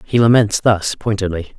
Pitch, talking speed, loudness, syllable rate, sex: 105 Hz, 150 wpm, -16 LUFS, 4.7 syllables/s, male